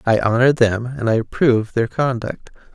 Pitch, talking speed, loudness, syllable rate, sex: 120 Hz, 175 wpm, -18 LUFS, 5.1 syllables/s, male